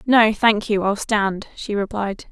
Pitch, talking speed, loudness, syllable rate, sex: 210 Hz, 180 wpm, -19 LUFS, 3.8 syllables/s, female